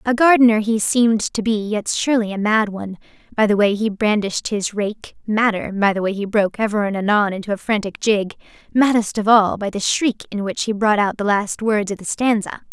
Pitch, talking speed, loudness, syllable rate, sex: 210 Hz, 215 wpm, -18 LUFS, 5.5 syllables/s, female